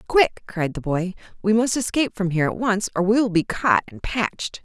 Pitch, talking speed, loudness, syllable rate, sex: 200 Hz, 235 wpm, -22 LUFS, 5.4 syllables/s, female